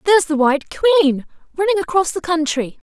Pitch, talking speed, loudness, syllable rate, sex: 335 Hz, 165 wpm, -17 LUFS, 6.2 syllables/s, female